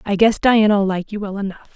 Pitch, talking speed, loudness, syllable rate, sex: 205 Hz, 240 wpm, -17 LUFS, 6.0 syllables/s, female